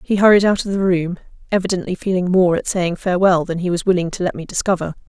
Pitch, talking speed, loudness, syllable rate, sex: 180 Hz, 235 wpm, -18 LUFS, 6.6 syllables/s, female